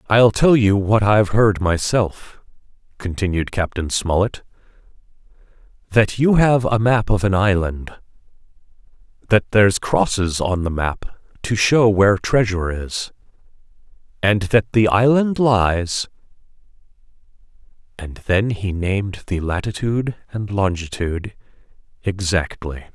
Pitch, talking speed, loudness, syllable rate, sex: 100 Hz, 110 wpm, -18 LUFS, 4.3 syllables/s, male